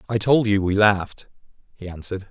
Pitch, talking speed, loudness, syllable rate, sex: 100 Hz, 180 wpm, -20 LUFS, 5.9 syllables/s, male